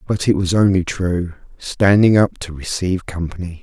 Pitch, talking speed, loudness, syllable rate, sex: 90 Hz, 165 wpm, -17 LUFS, 5.0 syllables/s, male